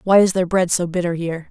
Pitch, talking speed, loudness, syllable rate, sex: 180 Hz, 280 wpm, -18 LUFS, 6.4 syllables/s, female